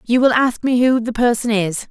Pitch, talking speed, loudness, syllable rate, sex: 240 Hz, 250 wpm, -16 LUFS, 5.0 syllables/s, female